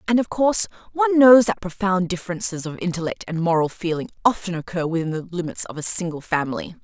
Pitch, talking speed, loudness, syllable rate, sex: 185 Hz, 195 wpm, -21 LUFS, 6.4 syllables/s, female